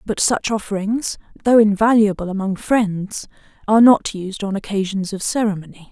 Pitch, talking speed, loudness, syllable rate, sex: 205 Hz, 140 wpm, -18 LUFS, 5.1 syllables/s, female